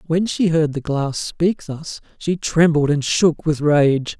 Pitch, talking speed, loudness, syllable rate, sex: 155 Hz, 185 wpm, -18 LUFS, 3.6 syllables/s, male